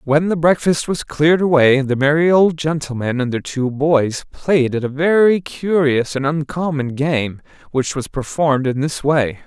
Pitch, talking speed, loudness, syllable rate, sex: 145 Hz, 175 wpm, -17 LUFS, 4.3 syllables/s, male